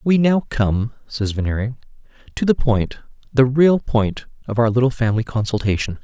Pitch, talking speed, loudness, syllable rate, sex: 120 Hz, 160 wpm, -19 LUFS, 5.1 syllables/s, male